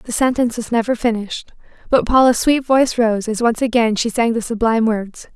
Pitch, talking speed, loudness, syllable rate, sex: 230 Hz, 200 wpm, -17 LUFS, 5.8 syllables/s, female